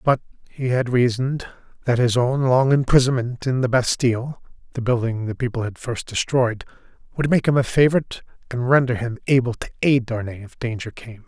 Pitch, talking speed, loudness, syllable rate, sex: 125 Hz, 170 wpm, -21 LUFS, 5.6 syllables/s, male